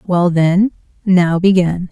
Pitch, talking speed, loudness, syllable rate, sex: 180 Hz, 125 wpm, -14 LUFS, 3.4 syllables/s, female